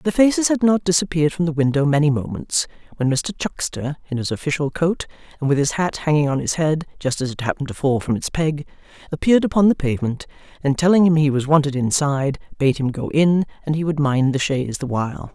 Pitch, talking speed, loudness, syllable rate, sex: 150 Hz, 225 wpm, -20 LUFS, 6.1 syllables/s, female